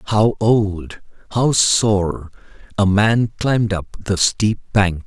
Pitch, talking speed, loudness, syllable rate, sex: 100 Hz, 130 wpm, -17 LUFS, 3.1 syllables/s, male